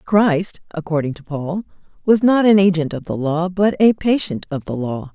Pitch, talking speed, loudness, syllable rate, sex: 175 Hz, 200 wpm, -18 LUFS, 4.8 syllables/s, female